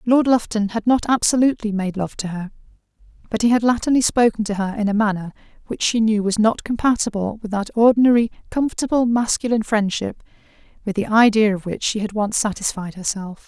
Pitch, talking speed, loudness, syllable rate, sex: 215 Hz, 185 wpm, -19 LUFS, 5.9 syllables/s, female